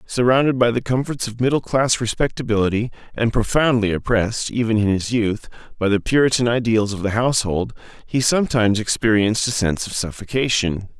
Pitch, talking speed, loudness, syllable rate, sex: 115 Hz, 160 wpm, -19 LUFS, 5.8 syllables/s, male